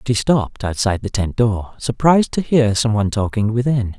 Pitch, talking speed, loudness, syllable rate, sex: 115 Hz, 210 wpm, -18 LUFS, 5.6 syllables/s, male